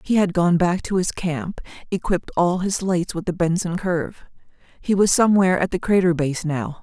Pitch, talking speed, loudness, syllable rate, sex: 180 Hz, 200 wpm, -20 LUFS, 5.4 syllables/s, female